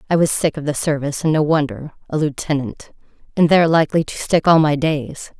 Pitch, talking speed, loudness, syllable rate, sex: 150 Hz, 200 wpm, -17 LUFS, 5.9 syllables/s, female